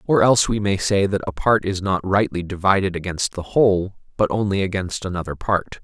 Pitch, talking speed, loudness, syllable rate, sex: 95 Hz, 205 wpm, -20 LUFS, 5.6 syllables/s, male